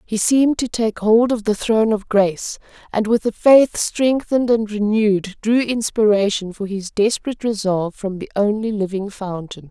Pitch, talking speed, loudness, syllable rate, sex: 215 Hz, 175 wpm, -18 LUFS, 5.0 syllables/s, female